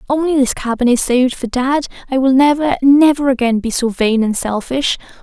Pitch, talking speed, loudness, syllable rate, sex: 260 Hz, 205 wpm, -14 LUFS, 5.6 syllables/s, female